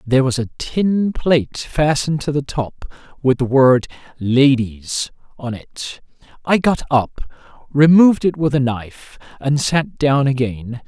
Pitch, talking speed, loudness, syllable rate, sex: 135 Hz, 150 wpm, -17 LUFS, 4.2 syllables/s, male